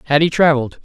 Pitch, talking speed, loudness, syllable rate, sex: 150 Hz, 215 wpm, -14 LUFS, 7.9 syllables/s, male